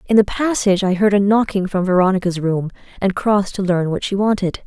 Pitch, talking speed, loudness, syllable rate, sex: 195 Hz, 220 wpm, -17 LUFS, 5.9 syllables/s, female